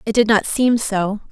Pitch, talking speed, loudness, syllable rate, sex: 215 Hz, 230 wpm, -17 LUFS, 4.5 syllables/s, female